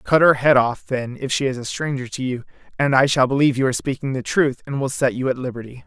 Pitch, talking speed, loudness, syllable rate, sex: 130 Hz, 275 wpm, -20 LUFS, 6.4 syllables/s, male